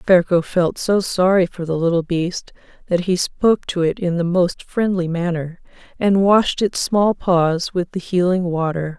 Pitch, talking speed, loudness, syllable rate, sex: 180 Hz, 180 wpm, -18 LUFS, 4.3 syllables/s, female